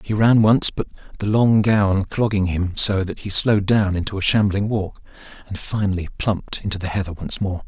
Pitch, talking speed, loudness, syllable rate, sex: 100 Hz, 205 wpm, -20 LUFS, 5.3 syllables/s, male